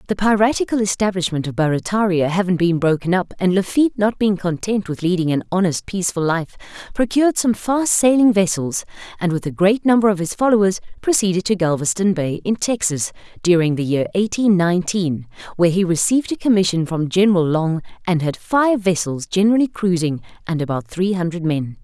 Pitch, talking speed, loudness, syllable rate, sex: 185 Hz, 175 wpm, -18 LUFS, 5.8 syllables/s, female